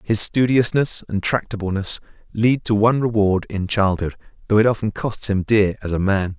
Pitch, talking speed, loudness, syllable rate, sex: 105 Hz, 180 wpm, -19 LUFS, 5.1 syllables/s, male